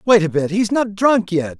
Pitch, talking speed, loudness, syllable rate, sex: 195 Hz, 300 wpm, -17 LUFS, 5.4 syllables/s, male